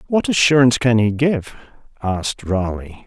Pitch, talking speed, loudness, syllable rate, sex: 120 Hz, 135 wpm, -17 LUFS, 4.9 syllables/s, male